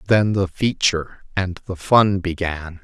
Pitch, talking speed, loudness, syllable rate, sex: 95 Hz, 150 wpm, -20 LUFS, 4.1 syllables/s, male